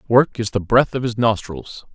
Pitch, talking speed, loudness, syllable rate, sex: 115 Hz, 215 wpm, -19 LUFS, 4.6 syllables/s, male